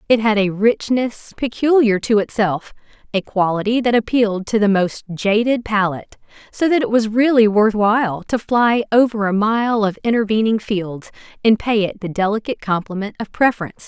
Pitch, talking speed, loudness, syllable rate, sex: 215 Hz, 170 wpm, -17 LUFS, 5.1 syllables/s, female